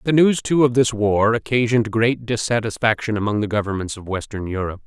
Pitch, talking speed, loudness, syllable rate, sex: 110 Hz, 185 wpm, -20 LUFS, 5.9 syllables/s, male